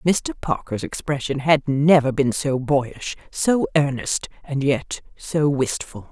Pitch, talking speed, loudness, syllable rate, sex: 140 Hz, 135 wpm, -21 LUFS, 3.6 syllables/s, female